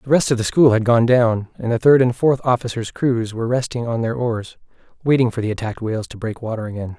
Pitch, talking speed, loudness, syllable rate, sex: 120 Hz, 250 wpm, -19 LUFS, 6.2 syllables/s, male